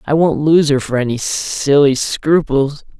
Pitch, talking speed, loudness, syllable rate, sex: 145 Hz, 160 wpm, -15 LUFS, 4.0 syllables/s, male